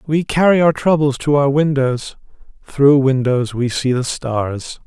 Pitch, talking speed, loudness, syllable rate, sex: 140 Hz, 160 wpm, -16 LUFS, 4.0 syllables/s, male